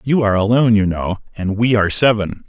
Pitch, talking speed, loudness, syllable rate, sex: 105 Hz, 220 wpm, -16 LUFS, 6.3 syllables/s, male